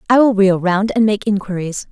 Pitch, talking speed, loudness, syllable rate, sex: 200 Hz, 220 wpm, -15 LUFS, 5.3 syllables/s, female